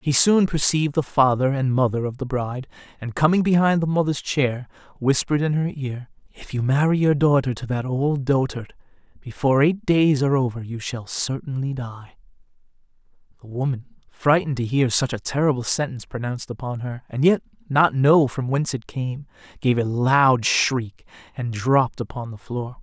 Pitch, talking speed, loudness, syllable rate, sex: 135 Hz, 175 wpm, -21 LUFS, 5.2 syllables/s, male